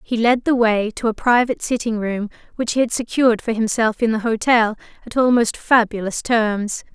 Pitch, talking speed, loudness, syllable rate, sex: 225 Hz, 190 wpm, -18 LUFS, 5.1 syllables/s, female